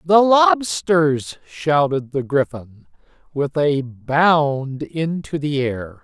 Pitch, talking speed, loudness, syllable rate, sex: 145 Hz, 110 wpm, -19 LUFS, 2.8 syllables/s, male